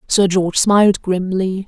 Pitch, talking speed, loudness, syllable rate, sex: 190 Hz, 145 wpm, -15 LUFS, 4.6 syllables/s, female